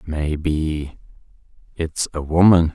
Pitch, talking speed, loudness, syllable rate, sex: 80 Hz, 85 wpm, -20 LUFS, 3.4 syllables/s, male